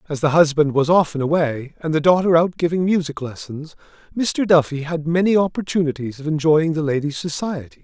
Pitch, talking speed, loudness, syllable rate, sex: 160 Hz, 175 wpm, -19 LUFS, 5.6 syllables/s, male